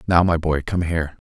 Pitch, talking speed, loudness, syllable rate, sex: 85 Hz, 235 wpm, -21 LUFS, 5.7 syllables/s, male